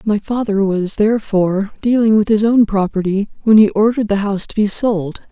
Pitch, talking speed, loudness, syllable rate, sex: 210 Hz, 190 wpm, -15 LUFS, 5.5 syllables/s, female